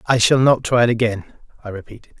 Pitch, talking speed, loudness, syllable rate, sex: 115 Hz, 220 wpm, -16 LUFS, 6.3 syllables/s, male